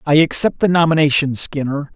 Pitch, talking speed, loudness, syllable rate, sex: 150 Hz, 155 wpm, -16 LUFS, 5.5 syllables/s, male